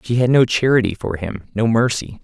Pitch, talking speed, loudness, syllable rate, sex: 110 Hz, 215 wpm, -17 LUFS, 5.4 syllables/s, male